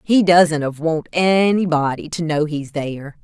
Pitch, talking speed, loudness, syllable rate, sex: 160 Hz, 165 wpm, -18 LUFS, 4.2 syllables/s, female